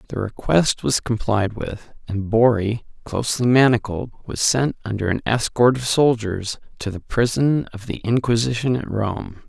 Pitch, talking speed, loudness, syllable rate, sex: 115 Hz, 150 wpm, -21 LUFS, 4.5 syllables/s, male